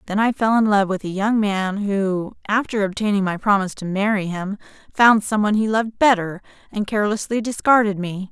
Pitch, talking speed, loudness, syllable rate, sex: 205 Hz, 195 wpm, -19 LUFS, 5.5 syllables/s, female